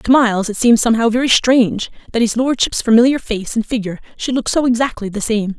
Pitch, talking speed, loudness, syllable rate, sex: 230 Hz, 215 wpm, -15 LUFS, 6.4 syllables/s, female